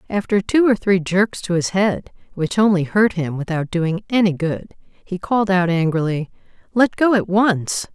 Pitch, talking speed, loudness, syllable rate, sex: 190 Hz, 180 wpm, -18 LUFS, 4.5 syllables/s, female